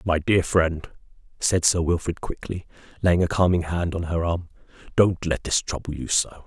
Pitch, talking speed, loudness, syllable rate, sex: 85 Hz, 185 wpm, -23 LUFS, 4.7 syllables/s, male